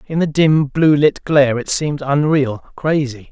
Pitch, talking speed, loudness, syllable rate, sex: 145 Hz, 180 wpm, -16 LUFS, 4.6 syllables/s, male